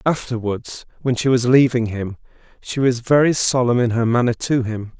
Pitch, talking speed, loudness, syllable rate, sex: 120 Hz, 180 wpm, -18 LUFS, 5.0 syllables/s, male